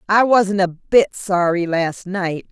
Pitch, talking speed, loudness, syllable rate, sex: 190 Hz, 165 wpm, -17 LUFS, 3.5 syllables/s, female